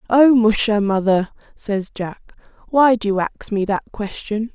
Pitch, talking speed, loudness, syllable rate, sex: 215 Hz, 160 wpm, -18 LUFS, 4.2 syllables/s, female